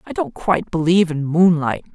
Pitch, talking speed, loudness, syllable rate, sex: 175 Hz, 185 wpm, -18 LUFS, 5.7 syllables/s, female